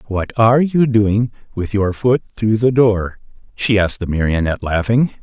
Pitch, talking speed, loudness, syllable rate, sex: 105 Hz, 170 wpm, -16 LUFS, 5.0 syllables/s, male